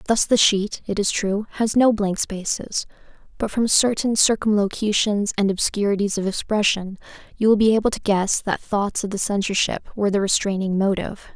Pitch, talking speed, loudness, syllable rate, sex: 205 Hz, 175 wpm, -21 LUFS, 5.2 syllables/s, female